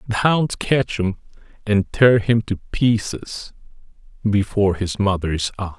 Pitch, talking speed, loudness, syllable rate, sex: 105 Hz, 135 wpm, -20 LUFS, 4.1 syllables/s, male